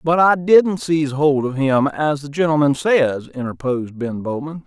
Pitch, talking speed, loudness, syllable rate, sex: 145 Hz, 180 wpm, -18 LUFS, 4.7 syllables/s, male